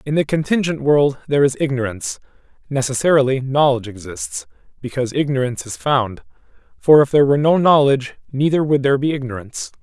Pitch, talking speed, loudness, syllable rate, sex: 135 Hz, 155 wpm, -17 LUFS, 6.5 syllables/s, male